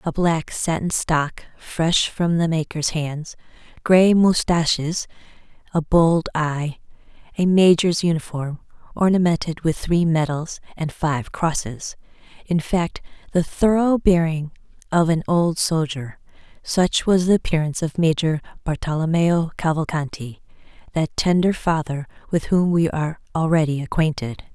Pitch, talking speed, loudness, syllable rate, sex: 165 Hz, 115 wpm, -20 LUFS, 4.3 syllables/s, female